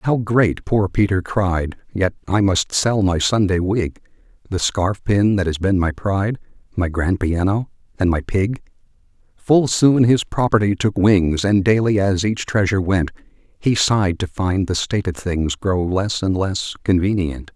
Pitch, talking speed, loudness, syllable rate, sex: 100 Hz, 170 wpm, -19 LUFS, 4.3 syllables/s, male